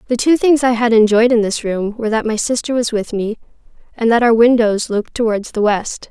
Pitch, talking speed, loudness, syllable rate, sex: 230 Hz, 235 wpm, -15 LUFS, 5.6 syllables/s, female